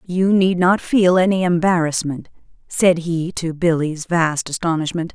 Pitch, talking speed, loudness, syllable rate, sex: 170 Hz, 140 wpm, -18 LUFS, 4.3 syllables/s, female